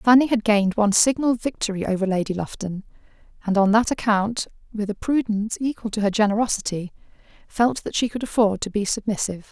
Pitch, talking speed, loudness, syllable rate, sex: 215 Hz, 175 wpm, -22 LUFS, 6.1 syllables/s, female